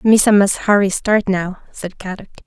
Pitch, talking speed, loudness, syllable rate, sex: 195 Hz, 170 wpm, -15 LUFS, 4.8 syllables/s, female